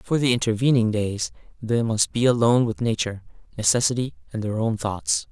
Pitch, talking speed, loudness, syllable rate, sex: 115 Hz, 170 wpm, -22 LUFS, 5.7 syllables/s, male